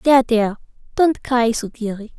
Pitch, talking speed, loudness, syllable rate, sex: 235 Hz, 110 wpm, -19 LUFS, 5.4 syllables/s, female